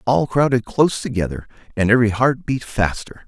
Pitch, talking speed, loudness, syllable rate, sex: 120 Hz, 165 wpm, -19 LUFS, 5.6 syllables/s, male